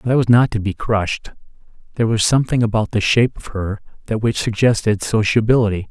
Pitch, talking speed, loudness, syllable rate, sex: 110 Hz, 195 wpm, -17 LUFS, 6.3 syllables/s, male